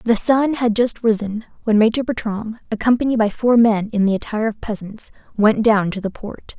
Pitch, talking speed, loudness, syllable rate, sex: 220 Hz, 200 wpm, -18 LUFS, 5.2 syllables/s, female